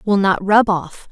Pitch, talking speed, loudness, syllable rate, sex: 195 Hz, 215 wpm, -16 LUFS, 3.7 syllables/s, female